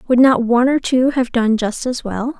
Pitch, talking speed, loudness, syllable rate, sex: 245 Hz, 250 wpm, -16 LUFS, 5.0 syllables/s, female